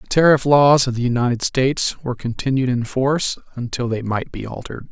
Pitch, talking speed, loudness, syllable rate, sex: 125 Hz, 195 wpm, -19 LUFS, 5.7 syllables/s, male